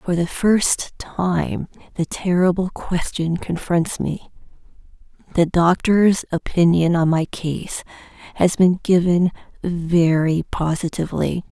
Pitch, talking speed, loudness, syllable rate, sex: 175 Hz, 105 wpm, -19 LUFS, 3.7 syllables/s, female